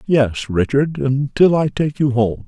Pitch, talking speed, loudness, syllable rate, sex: 135 Hz, 170 wpm, -17 LUFS, 3.9 syllables/s, male